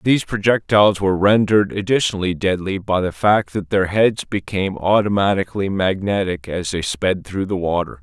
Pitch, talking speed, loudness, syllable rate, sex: 95 Hz, 155 wpm, -18 LUFS, 5.4 syllables/s, male